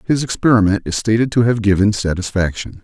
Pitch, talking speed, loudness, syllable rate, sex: 105 Hz, 170 wpm, -16 LUFS, 5.9 syllables/s, male